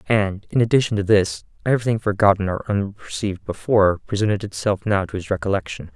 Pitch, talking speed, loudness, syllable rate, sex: 100 Hz, 160 wpm, -21 LUFS, 6.2 syllables/s, male